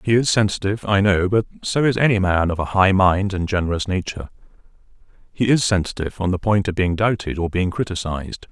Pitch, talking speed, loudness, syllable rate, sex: 95 Hz, 205 wpm, -19 LUFS, 6.1 syllables/s, male